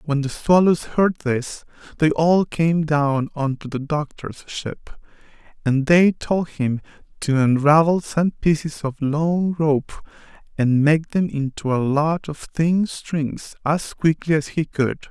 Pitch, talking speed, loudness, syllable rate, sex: 150 Hz, 155 wpm, -20 LUFS, 3.6 syllables/s, male